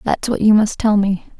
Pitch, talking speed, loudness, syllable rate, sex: 210 Hz, 260 wpm, -16 LUFS, 4.9 syllables/s, female